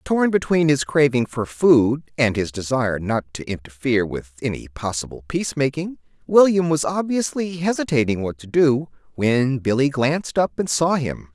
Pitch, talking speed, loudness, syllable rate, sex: 135 Hz, 165 wpm, -20 LUFS, 4.9 syllables/s, male